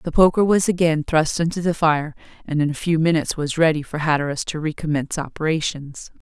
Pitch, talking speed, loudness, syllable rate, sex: 160 Hz, 195 wpm, -20 LUFS, 5.8 syllables/s, female